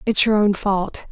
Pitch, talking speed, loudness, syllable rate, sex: 205 Hz, 215 wpm, -18 LUFS, 4.1 syllables/s, female